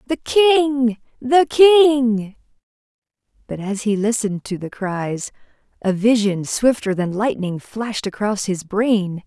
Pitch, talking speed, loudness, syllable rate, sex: 225 Hz, 130 wpm, -18 LUFS, 3.7 syllables/s, female